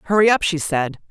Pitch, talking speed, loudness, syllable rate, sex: 175 Hz, 220 wpm, -18 LUFS, 6.3 syllables/s, female